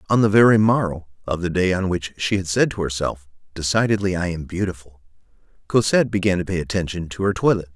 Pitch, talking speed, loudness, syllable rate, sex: 95 Hz, 200 wpm, -20 LUFS, 6.3 syllables/s, male